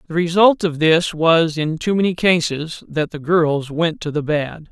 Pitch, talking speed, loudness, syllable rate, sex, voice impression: 160 Hz, 205 wpm, -18 LUFS, 4.2 syllables/s, male, masculine, adult-like, tensed, powerful, clear, slightly fluent, slightly nasal, friendly, unique, lively